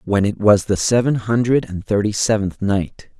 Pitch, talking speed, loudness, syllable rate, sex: 105 Hz, 190 wpm, -18 LUFS, 4.6 syllables/s, male